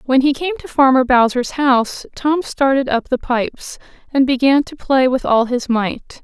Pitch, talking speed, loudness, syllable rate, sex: 265 Hz, 195 wpm, -16 LUFS, 4.6 syllables/s, female